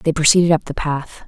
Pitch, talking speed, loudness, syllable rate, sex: 155 Hz, 235 wpm, -17 LUFS, 5.7 syllables/s, female